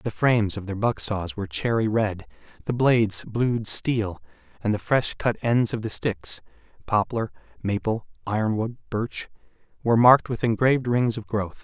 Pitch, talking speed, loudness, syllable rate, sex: 110 Hz, 160 wpm, -24 LUFS, 4.8 syllables/s, male